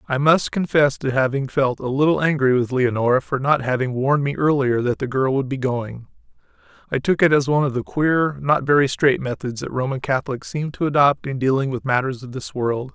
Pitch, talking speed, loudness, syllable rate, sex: 135 Hz, 220 wpm, -20 LUFS, 5.5 syllables/s, male